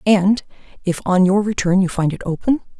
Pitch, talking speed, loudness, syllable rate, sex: 190 Hz, 195 wpm, -18 LUFS, 5.2 syllables/s, female